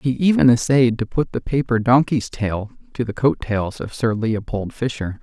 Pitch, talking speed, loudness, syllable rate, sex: 120 Hz, 195 wpm, -20 LUFS, 4.7 syllables/s, male